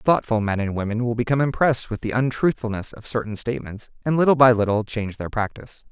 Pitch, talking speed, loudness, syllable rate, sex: 120 Hz, 205 wpm, -22 LUFS, 6.4 syllables/s, male